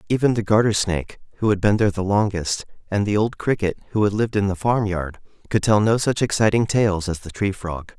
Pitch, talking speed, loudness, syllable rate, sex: 100 Hz, 235 wpm, -21 LUFS, 5.9 syllables/s, male